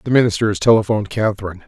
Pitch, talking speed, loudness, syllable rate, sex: 105 Hz, 145 wpm, -17 LUFS, 7.9 syllables/s, male